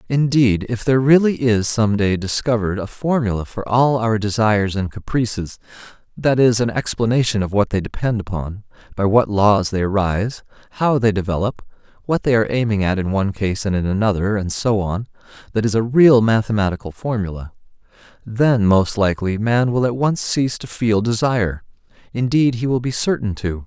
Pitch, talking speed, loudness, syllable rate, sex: 110 Hz, 170 wpm, -18 LUFS, 5.4 syllables/s, male